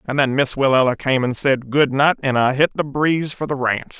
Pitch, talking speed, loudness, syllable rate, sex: 135 Hz, 255 wpm, -18 LUFS, 5.5 syllables/s, male